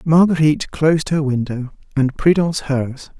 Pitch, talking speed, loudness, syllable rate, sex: 150 Hz, 130 wpm, -18 LUFS, 5.0 syllables/s, male